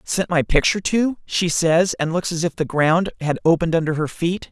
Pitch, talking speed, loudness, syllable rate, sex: 170 Hz, 225 wpm, -20 LUFS, 5.2 syllables/s, male